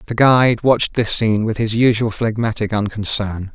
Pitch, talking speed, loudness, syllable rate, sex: 110 Hz, 170 wpm, -17 LUFS, 5.3 syllables/s, male